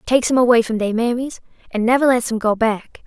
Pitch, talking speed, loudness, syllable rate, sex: 235 Hz, 235 wpm, -17 LUFS, 6.0 syllables/s, female